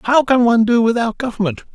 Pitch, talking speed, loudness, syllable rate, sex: 230 Hz, 205 wpm, -15 LUFS, 6.5 syllables/s, male